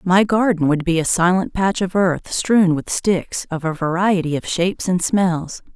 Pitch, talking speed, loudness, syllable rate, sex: 180 Hz, 200 wpm, -18 LUFS, 4.4 syllables/s, female